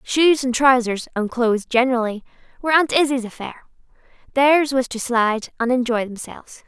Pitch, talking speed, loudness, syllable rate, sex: 250 Hz, 155 wpm, -19 LUFS, 5.4 syllables/s, female